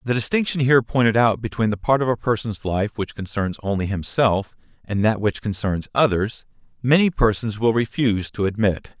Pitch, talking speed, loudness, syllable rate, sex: 110 Hz, 180 wpm, -21 LUFS, 5.3 syllables/s, male